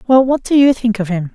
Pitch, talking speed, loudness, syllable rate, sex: 235 Hz, 315 wpm, -14 LUFS, 5.9 syllables/s, female